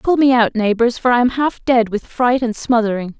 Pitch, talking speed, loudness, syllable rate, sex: 235 Hz, 245 wpm, -16 LUFS, 5.2 syllables/s, female